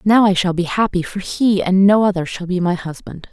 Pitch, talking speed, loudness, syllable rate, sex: 185 Hz, 255 wpm, -16 LUFS, 5.3 syllables/s, female